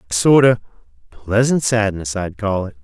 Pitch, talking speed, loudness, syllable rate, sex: 105 Hz, 170 wpm, -17 LUFS, 3.9 syllables/s, male